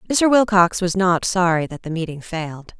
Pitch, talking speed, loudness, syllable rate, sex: 180 Hz, 195 wpm, -19 LUFS, 5.0 syllables/s, female